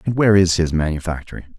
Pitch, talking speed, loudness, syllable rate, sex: 85 Hz, 190 wpm, -17 LUFS, 7.4 syllables/s, male